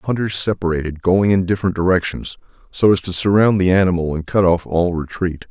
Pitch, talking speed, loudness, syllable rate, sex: 90 Hz, 195 wpm, -17 LUFS, 5.9 syllables/s, male